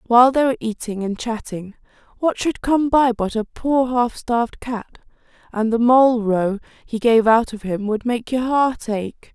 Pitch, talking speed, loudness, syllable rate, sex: 235 Hz, 195 wpm, -19 LUFS, 4.4 syllables/s, female